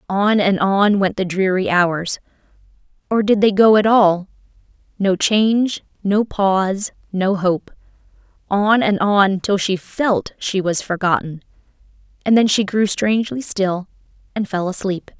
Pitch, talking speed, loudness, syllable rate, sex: 195 Hz, 135 wpm, -17 LUFS, 4.1 syllables/s, female